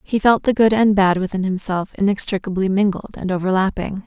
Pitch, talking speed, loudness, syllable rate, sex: 195 Hz, 175 wpm, -18 LUFS, 5.6 syllables/s, female